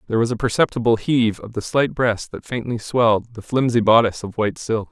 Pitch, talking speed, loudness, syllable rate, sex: 115 Hz, 220 wpm, -20 LUFS, 6.1 syllables/s, male